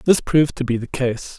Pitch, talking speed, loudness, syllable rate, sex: 130 Hz, 260 wpm, -20 LUFS, 5.2 syllables/s, male